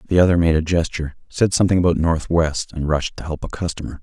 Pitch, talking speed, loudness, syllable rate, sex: 85 Hz, 225 wpm, -19 LUFS, 6.5 syllables/s, male